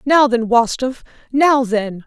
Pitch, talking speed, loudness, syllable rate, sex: 245 Hz, 145 wpm, -16 LUFS, 3.8 syllables/s, female